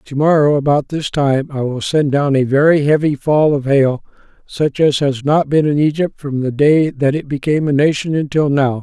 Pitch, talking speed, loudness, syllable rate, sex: 145 Hz, 220 wpm, -15 LUFS, 4.9 syllables/s, male